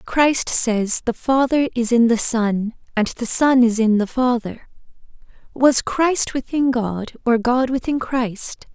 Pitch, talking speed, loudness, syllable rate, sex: 240 Hz, 160 wpm, -18 LUFS, 3.7 syllables/s, female